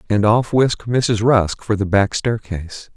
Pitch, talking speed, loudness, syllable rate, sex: 110 Hz, 180 wpm, -18 LUFS, 4.4 syllables/s, male